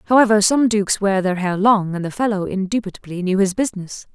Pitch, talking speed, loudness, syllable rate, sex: 200 Hz, 205 wpm, -18 LUFS, 6.1 syllables/s, female